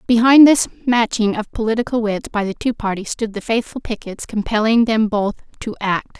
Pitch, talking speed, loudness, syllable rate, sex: 225 Hz, 185 wpm, -17 LUFS, 5.2 syllables/s, female